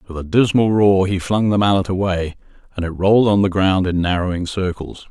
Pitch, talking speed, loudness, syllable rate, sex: 95 Hz, 210 wpm, -17 LUFS, 5.5 syllables/s, male